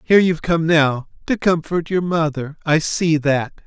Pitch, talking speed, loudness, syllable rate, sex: 160 Hz, 180 wpm, -18 LUFS, 4.6 syllables/s, male